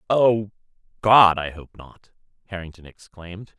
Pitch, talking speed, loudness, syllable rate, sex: 95 Hz, 115 wpm, -18 LUFS, 4.5 syllables/s, male